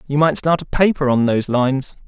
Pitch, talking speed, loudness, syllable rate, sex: 140 Hz, 230 wpm, -17 LUFS, 6.0 syllables/s, male